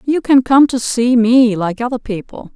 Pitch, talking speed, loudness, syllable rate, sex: 240 Hz, 210 wpm, -13 LUFS, 4.5 syllables/s, female